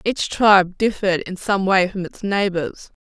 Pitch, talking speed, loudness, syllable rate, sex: 190 Hz, 180 wpm, -19 LUFS, 4.6 syllables/s, female